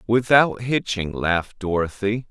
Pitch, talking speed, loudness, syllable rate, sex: 105 Hz, 105 wpm, -21 LUFS, 4.2 syllables/s, male